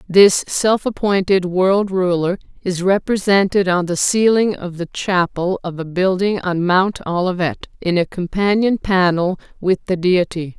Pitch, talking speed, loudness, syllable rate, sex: 185 Hz, 145 wpm, -17 LUFS, 4.2 syllables/s, female